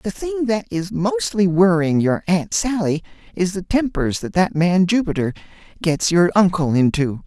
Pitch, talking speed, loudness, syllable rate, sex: 180 Hz, 165 wpm, -19 LUFS, 4.5 syllables/s, male